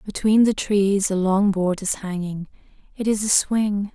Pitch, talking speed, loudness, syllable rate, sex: 200 Hz, 165 wpm, -21 LUFS, 4.1 syllables/s, female